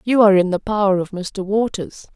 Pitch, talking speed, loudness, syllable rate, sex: 200 Hz, 225 wpm, -18 LUFS, 5.5 syllables/s, female